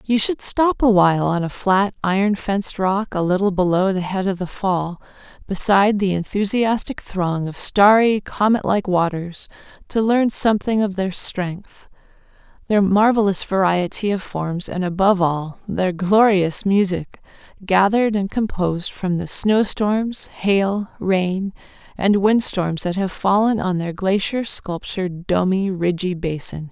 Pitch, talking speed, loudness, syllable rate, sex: 195 Hz, 150 wpm, -19 LUFS, 4.2 syllables/s, female